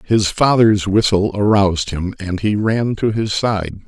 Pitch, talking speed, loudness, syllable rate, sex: 100 Hz, 170 wpm, -16 LUFS, 4.2 syllables/s, male